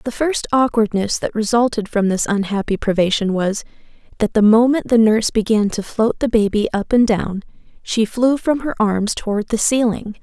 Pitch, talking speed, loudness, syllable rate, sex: 220 Hz, 180 wpm, -17 LUFS, 4.9 syllables/s, female